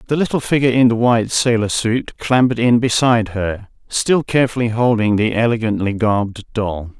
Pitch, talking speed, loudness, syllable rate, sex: 115 Hz, 165 wpm, -16 LUFS, 5.6 syllables/s, male